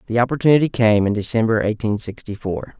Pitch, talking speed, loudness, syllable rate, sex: 115 Hz, 170 wpm, -19 LUFS, 6.2 syllables/s, male